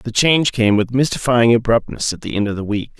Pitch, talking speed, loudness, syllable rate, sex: 115 Hz, 240 wpm, -17 LUFS, 5.9 syllables/s, male